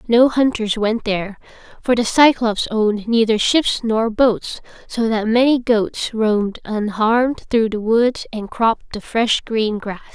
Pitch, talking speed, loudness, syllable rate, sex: 225 Hz, 160 wpm, -17 LUFS, 4.3 syllables/s, female